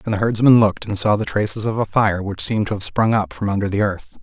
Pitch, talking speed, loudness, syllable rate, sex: 105 Hz, 300 wpm, -18 LUFS, 6.4 syllables/s, male